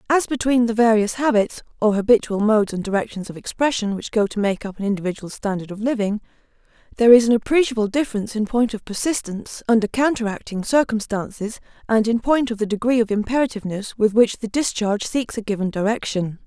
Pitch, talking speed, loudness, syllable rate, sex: 220 Hz, 180 wpm, -20 LUFS, 6.2 syllables/s, female